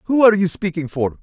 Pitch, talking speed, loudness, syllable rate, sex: 185 Hz, 245 wpm, -18 LUFS, 6.7 syllables/s, male